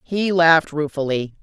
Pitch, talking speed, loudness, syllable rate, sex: 155 Hz, 125 wpm, -18 LUFS, 4.8 syllables/s, female